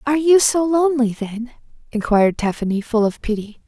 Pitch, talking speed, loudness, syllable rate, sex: 245 Hz, 165 wpm, -18 LUFS, 5.8 syllables/s, female